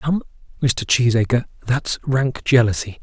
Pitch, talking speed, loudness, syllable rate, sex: 120 Hz, 120 wpm, -19 LUFS, 4.3 syllables/s, male